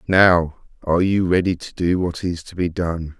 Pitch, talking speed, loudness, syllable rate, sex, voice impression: 85 Hz, 190 wpm, -20 LUFS, 4.6 syllables/s, male, very masculine, very adult-like, old, very thick, slightly relaxed, slightly weak, slightly bright, soft, clear, fluent, cool, very intellectual, very sincere, very calm, very mature, friendly, very reassuring, very unique, elegant, very wild, sweet, slightly lively, kind, slightly modest